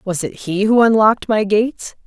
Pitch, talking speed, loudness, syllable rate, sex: 210 Hz, 205 wpm, -15 LUFS, 5.3 syllables/s, female